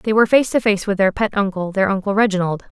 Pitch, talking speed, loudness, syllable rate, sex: 200 Hz, 235 wpm, -18 LUFS, 6.3 syllables/s, female